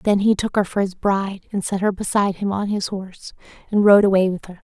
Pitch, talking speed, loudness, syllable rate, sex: 195 Hz, 255 wpm, -19 LUFS, 5.9 syllables/s, female